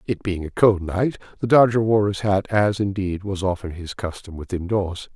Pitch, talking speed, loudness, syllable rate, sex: 100 Hz, 210 wpm, -21 LUFS, 4.8 syllables/s, male